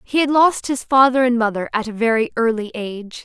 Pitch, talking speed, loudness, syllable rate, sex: 240 Hz, 220 wpm, -18 LUFS, 5.6 syllables/s, female